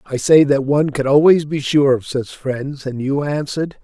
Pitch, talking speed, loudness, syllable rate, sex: 140 Hz, 220 wpm, -16 LUFS, 5.0 syllables/s, male